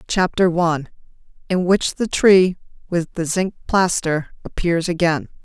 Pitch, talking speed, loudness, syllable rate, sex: 175 Hz, 120 wpm, -19 LUFS, 4.2 syllables/s, female